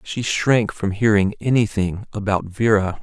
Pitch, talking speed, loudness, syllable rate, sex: 105 Hz, 140 wpm, -20 LUFS, 4.3 syllables/s, male